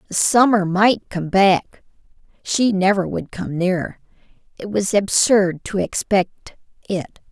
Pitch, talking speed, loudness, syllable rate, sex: 195 Hz, 130 wpm, -18 LUFS, 3.8 syllables/s, female